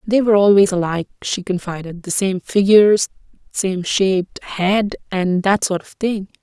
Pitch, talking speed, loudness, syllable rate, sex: 195 Hz, 150 wpm, -17 LUFS, 4.8 syllables/s, female